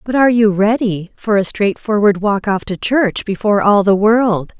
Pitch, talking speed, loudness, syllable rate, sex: 205 Hz, 185 wpm, -14 LUFS, 4.8 syllables/s, female